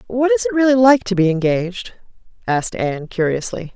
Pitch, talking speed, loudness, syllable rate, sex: 215 Hz, 175 wpm, -17 LUFS, 5.8 syllables/s, female